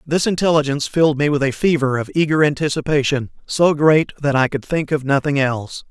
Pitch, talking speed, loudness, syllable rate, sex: 145 Hz, 195 wpm, -18 LUFS, 5.9 syllables/s, male